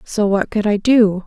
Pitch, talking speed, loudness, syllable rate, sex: 210 Hz, 240 wpm, -16 LUFS, 4.3 syllables/s, female